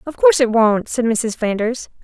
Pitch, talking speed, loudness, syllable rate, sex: 220 Hz, 205 wpm, -17 LUFS, 5.0 syllables/s, female